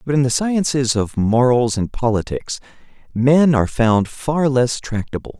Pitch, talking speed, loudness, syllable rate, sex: 125 Hz, 155 wpm, -18 LUFS, 4.4 syllables/s, male